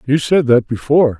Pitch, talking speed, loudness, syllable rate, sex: 135 Hz, 200 wpm, -14 LUFS, 5.7 syllables/s, male